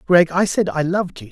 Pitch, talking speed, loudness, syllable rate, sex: 175 Hz, 275 wpm, -18 LUFS, 5.9 syllables/s, male